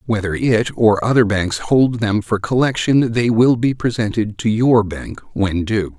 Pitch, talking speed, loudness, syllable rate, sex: 110 Hz, 180 wpm, -17 LUFS, 4.2 syllables/s, male